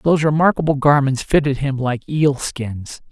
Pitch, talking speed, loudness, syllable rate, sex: 140 Hz, 155 wpm, -18 LUFS, 4.7 syllables/s, male